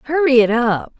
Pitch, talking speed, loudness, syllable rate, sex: 255 Hz, 180 wpm, -15 LUFS, 5.1 syllables/s, female